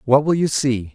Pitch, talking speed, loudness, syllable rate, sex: 135 Hz, 255 wpm, -18 LUFS, 4.8 syllables/s, male